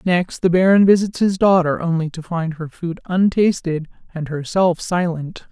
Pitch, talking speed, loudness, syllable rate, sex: 175 Hz, 165 wpm, -18 LUFS, 4.5 syllables/s, female